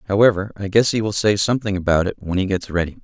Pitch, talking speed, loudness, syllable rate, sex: 100 Hz, 255 wpm, -19 LUFS, 7.0 syllables/s, male